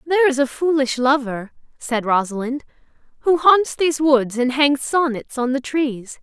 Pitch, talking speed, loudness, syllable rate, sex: 270 Hz, 165 wpm, -19 LUFS, 4.6 syllables/s, female